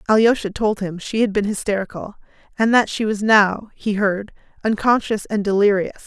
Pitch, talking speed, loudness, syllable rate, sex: 210 Hz, 170 wpm, -19 LUFS, 5.1 syllables/s, female